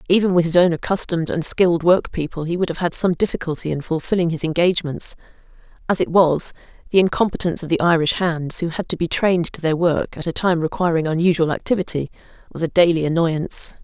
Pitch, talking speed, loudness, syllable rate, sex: 170 Hz, 195 wpm, -19 LUFS, 6.3 syllables/s, female